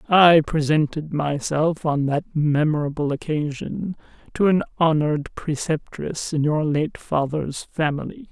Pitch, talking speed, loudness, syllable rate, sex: 155 Hz, 115 wpm, -22 LUFS, 4.1 syllables/s, female